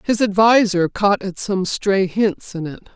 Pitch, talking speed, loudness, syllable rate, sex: 195 Hz, 180 wpm, -18 LUFS, 3.9 syllables/s, female